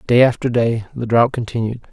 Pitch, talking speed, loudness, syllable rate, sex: 115 Hz, 190 wpm, -17 LUFS, 5.6 syllables/s, male